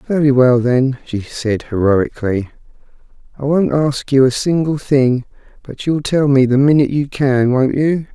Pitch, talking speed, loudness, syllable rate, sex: 135 Hz, 170 wpm, -15 LUFS, 4.4 syllables/s, male